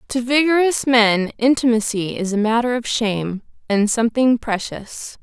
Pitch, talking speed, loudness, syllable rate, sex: 230 Hz, 125 wpm, -18 LUFS, 4.7 syllables/s, female